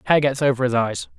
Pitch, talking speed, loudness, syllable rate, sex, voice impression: 130 Hz, 255 wpm, -20 LUFS, 6.5 syllables/s, male, masculine, adult-like, tensed, powerful, slightly muffled, fluent, slightly raspy, cool, intellectual, slightly refreshing, wild, lively, slightly intense, sharp